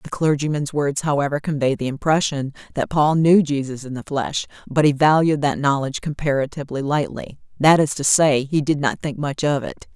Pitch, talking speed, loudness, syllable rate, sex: 145 Hz, 195 wpm, -20 LUFS, 5.4 syllables/s, female